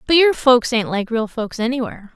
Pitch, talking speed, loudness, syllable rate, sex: 240 Hz, 225 wpm, -18 LUFS, 5.5 syllables/s, female